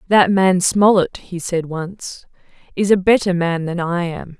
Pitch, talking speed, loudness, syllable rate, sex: 180 Hz, 180 wpm, -17 LUFS, 4.1 syllables/s, female